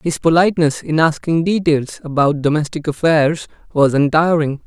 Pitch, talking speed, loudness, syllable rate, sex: 155 Hz, 130 wpm, -16 LUFS, 4.9 syllables/s, male